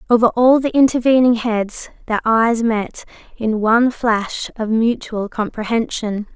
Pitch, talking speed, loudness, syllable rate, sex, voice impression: 230 Hz, 130 wpm, -17 LUFS, 4.2 syllables/s, female, gender-neutral, young, bright, soft, halting, friendly, unique, slightly sweet, kind, slightly modest